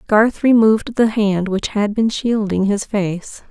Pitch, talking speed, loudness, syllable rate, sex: 210 Hz, 170 wpm, -17 LUFS, 4.0 syllables/s, female